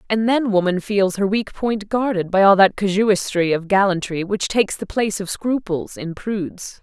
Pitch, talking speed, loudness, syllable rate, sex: 200 Hz, 195 wpm, -19 LUFS, 4.8 syllables/s, female